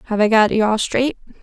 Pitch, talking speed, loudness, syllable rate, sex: 220 Hz, 250 wpm, -17 LUFS, 6.0 syllables/s, female